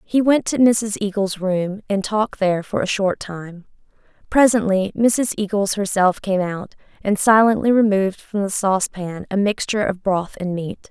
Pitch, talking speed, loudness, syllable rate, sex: 200 Hz, 170 wpm, -19 LUFS, 4.7 syllables/s, female